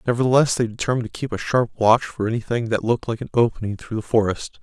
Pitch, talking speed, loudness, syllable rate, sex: 115 Hz, 235 wpm, -21 LUFS, 6.9 syllables/s, male